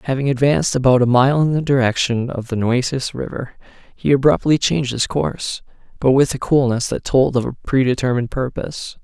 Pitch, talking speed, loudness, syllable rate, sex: 130 Hz, 180 wpm, -18 LUFS, 5.8 syllables/s, male